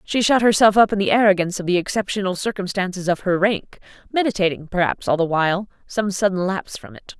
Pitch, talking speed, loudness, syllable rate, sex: 195 Hz, 200 wpm, -19 LUFS, 6.2 syllables/s, female